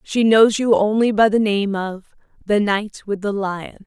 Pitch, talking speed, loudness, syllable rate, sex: 205 Hz, 200 wpm, -18 LUFS, 4.0 syllables/s, female